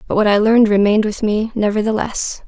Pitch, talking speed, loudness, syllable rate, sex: 215 Hz, 195 wpm, -16 LUFS, 6.2 syllables/s, female